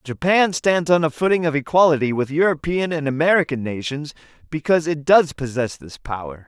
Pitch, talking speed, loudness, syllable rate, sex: 150 Hz, 165 wpm, -19 LUFS, 5.5 syllables/s, male